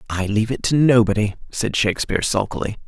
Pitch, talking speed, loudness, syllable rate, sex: 110 Hz, 165 wpm, -19 LUFS, 6.4 syllables/s, male